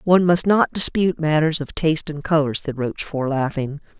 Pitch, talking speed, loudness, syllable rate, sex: 155 Hz, 180 wpm, -20 LUFS, 5.7 syllables/s, female